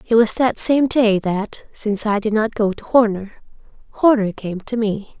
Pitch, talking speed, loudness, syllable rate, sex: 220 Hz, 195 wpm, -18 LUFS, 4.6 syllables/s, female